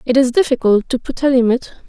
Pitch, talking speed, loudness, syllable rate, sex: 250 Hz, 225 wpm, -15 LUFS, 6.0 syllables/s, female